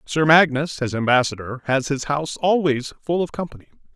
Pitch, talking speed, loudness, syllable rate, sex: 145 Hz, 165 wpm, -20 LUFS, 5.5 syllables/s, male